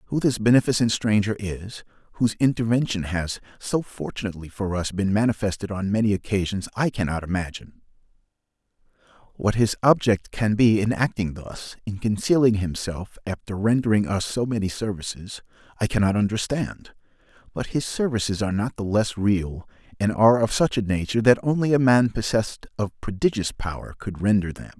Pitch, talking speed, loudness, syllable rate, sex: 105 Hz, 155 wpm, -23 LUFS, 5.5 syllables/s, male